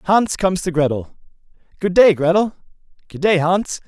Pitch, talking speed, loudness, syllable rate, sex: 180 Hz, 155 wpm, -17 LUFS, 4.9 syllables/s, male